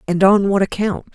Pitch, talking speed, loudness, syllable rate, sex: 195 Hz, 210 wpm, -16 LUFS, 5.4 syllables/s, female